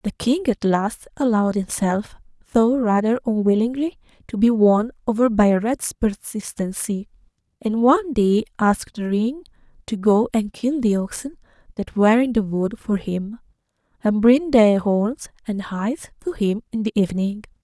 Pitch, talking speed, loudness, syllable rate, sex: 225 Hz, 155 wpm, -20 LUFS, 4.6 syllables/s, female